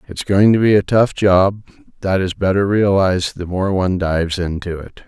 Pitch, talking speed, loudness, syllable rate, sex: 95 Hz, 200 wpm, -16 LUFS, 5.1 syllables/s, male